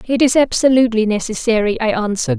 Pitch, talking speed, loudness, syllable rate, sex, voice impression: 220 Hz, 150 wpm, -15 LUFS, 6.6 syllables/s, female, very feminine, young, thin, tensed, slightly weak, bright, hard, very clear, very fluent, very cute, intellectual, very refreshing, very sincere, slightly calm, very friendly, very reassuring, very unique, elegant, very sweet, lively, strict, slightly intense, slightly modest, very light